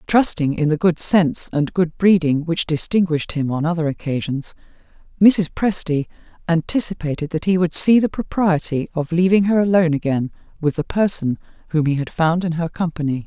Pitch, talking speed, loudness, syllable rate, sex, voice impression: 165 Hz, 170 wpm, -19 LUFS, 5.4 syllables/s, female, very feminine, middle-aged, slightly thin, slightly relaxed, very powerful, slightly dark, slightly hard, very clear, very fluent, cool, very intellectual, refreshing, sincere, slightly calm, slightly friendly, slightly reassuring, unique, elegant, slightly wild, sweet, lively, slightly kind, intense, sharp, light